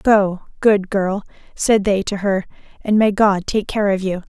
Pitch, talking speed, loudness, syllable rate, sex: 200 Hz, 195 wpm, -18 LUFS, 4.2 syllables/s, female